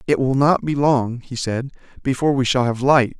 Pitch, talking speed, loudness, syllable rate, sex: 130 Hz, 225 wpm, -19 LUFS, 5.2 syllables/s, male